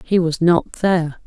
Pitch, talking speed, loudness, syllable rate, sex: 170 Hz, 190 wpm, -18 LUFS, 4.4 syllables/s, female